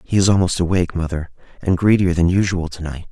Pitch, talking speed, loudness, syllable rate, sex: 90 Hz, 210 wpm, -18 LUFS, 6.3 syllables/s, male